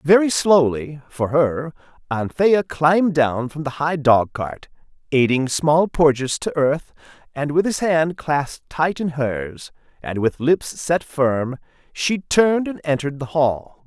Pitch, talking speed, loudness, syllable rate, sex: 150 Hz, 155 wpm, -20 LUFS, 3.9 syllables/s, male